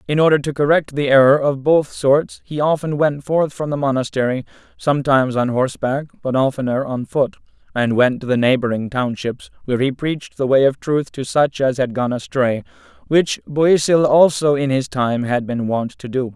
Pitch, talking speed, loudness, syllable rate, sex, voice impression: 135 Hz, 195 wpm, -18 LUFS, 5.1 syllables/s, male, very masculine, adult-like, slightly middle-aged, thick, tensed, slightly powerful, slightly dark, very hard, clear, slightly halting, slightly raspy, slightly cool, very intellectual, slightly refreshing, sincere, very calm, slightly mature, unique, elegant, slightly kind, slightly modest